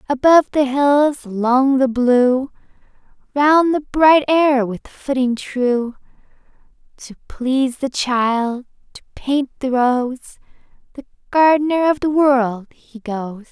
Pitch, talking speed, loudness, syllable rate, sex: 265 Hz, 125 wpm, -16 LUFS, 3.5 syllables/s, female